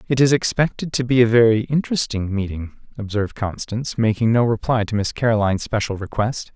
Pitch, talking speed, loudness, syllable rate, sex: 115 Hz, 175 wpm, -20 LUFS, 6.0 syllables/s, male